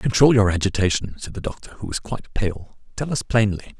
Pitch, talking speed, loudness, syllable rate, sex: 105 Hz, 205 wpm, -22 LUFS, 5.8 syllables/s, male